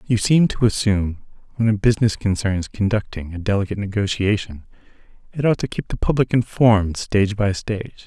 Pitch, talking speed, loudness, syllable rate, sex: 105 Hz, 170 wpm, -20 LUFS, 6.1 syllables/s, male